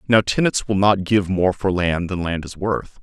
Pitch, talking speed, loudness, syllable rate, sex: 95 Hz, 240 wpm, -20 LUFS, 4.6 syllables/s, male